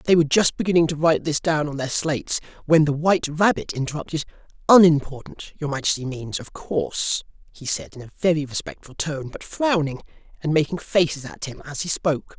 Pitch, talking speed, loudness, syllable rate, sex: 155 Hz, 190 wpm, -22 LUFS, 5.8 syllables/s, male